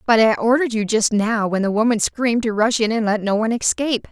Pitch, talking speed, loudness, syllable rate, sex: 225 Hz, 265 wpm, -18 LUFS, 6.3 syllables/s, female